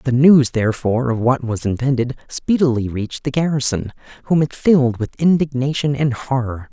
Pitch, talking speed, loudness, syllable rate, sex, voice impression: 130 Hz, 160 wpm, -18 LUFS, 5.4 syllables/s, male, very masculine, adult-like, slightly thick, slightly tensed, slightly powerful, bright, soft, slightly muffled, fluent, slightly cool, intellectual, refreshing, sincere, very calm, friendly, reassuring, slightly unique, elegant, sweet, lively, kind, slightly modest